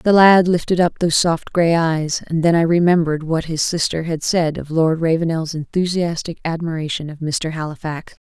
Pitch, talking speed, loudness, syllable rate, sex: 165 Hz, 180 wpm, -18 LUFS, 5.1 syllables/s, female